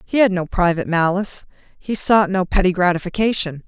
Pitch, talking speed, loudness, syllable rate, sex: 185 Hz, 145 wpm, -18 LUFS, 5.9 syllables/s, female